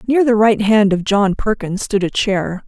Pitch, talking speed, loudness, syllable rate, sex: 205 Hz, 225 wpm, -15 LUFS, 4.4 syllables/s, female